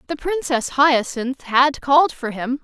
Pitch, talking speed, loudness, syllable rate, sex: 270 Hz, 160 wpm, -19 LUFS, 4.1 syllables/s, female